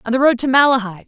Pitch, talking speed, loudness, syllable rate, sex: 245 Hz, 280 wpm, -15 LUFS, 8.4 syllables/s, female